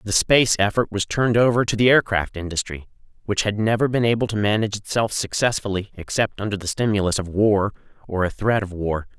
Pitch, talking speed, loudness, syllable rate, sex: 105 Hz, 195 wpm, -21 LUFS, 6.0 syllables/s, male